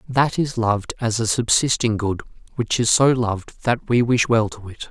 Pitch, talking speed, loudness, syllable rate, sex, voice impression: 115 Hz, 210 wpm, -20 LUFS, 4.8 syllables/s, male, very masculine, middle-aged, slightly thick, slightly relaxed, slightly powerful, dark, soft, slightly muffled, fluent, cool, very intellectual, refreshing, sincere, very calm, mature, friendly, reassuring, unique, elegant, sweet, kind, modest